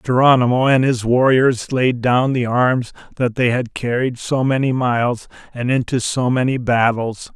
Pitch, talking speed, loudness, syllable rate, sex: 125 Hz, 165 wpm, -17 LUFS, 4.4 syllables/s, male